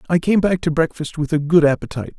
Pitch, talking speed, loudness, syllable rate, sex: 160 Hz, 245 wpm, -18 LUFS, 6.8 syllables/s, male